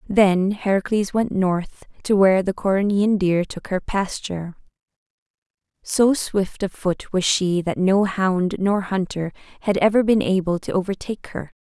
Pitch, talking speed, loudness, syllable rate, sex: 195 Hz, 155 wpm, -21 LUFS, 4.5 syllables/s, female